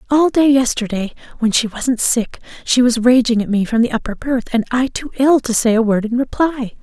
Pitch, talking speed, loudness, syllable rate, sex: 240 Hz, 230 wpm, -16 LUFS, 5.3 syllables/s, female